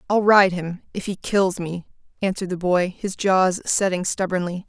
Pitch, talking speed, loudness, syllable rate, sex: 185 Hz, 165 wpm, -21 LUFS, 4.7 syllables/s, female